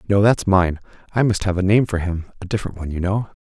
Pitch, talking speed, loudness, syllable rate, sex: 95 Hz, 245 wpm, -20 LUFS, 6.8 syllables/s, male